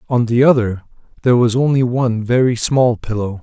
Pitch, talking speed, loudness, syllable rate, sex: 120 Hz, 175 wpm, -15 LUFS, 5.6 syllables/s, male